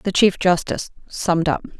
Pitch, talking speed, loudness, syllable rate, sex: 170 Hz, 165 wpm, -20 LUFS, 5.3 syllables/s, female